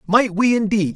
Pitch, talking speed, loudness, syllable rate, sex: 210 Hz, 190 wpm, -18 LUFS, 4.7 syllables/s, male